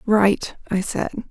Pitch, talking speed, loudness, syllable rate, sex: 205 Hz, 140 wpm, -22 LUFS, 3.4 syllables/s, female